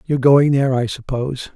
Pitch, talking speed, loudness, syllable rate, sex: 135 Hz, 195 wpm, -17 LUFS, 6.3 syllables/s, male